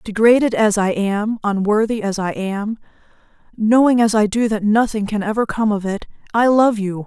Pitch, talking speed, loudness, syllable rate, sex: 215 Hz, 170 wpm, -17 LUFS, 4.9 syllables/s, female